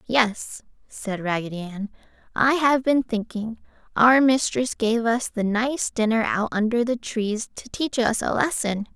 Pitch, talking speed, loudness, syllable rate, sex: 230 Hz, 160 wpm, -22 LUFS, 4.1 syllables/s, female